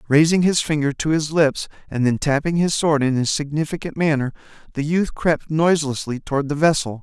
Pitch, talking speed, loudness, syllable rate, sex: 150 Hz, 190 wpm, -20 LUFS, 5.5 syllables/s, male